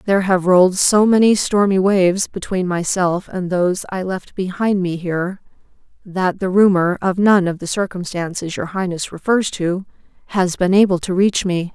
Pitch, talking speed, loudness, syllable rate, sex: 185 Hz, 175 wpm, -17 LUFS, 4.9 syllables/s, female